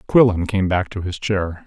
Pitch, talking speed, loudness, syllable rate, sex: 95 Hz, 215 wpm, -19 LUFS, 4.7 syllables/s, male